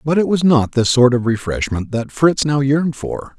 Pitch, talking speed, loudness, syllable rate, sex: 135 Hz, 230 wpm, -16 LUFS, 4.9 syllables/s, male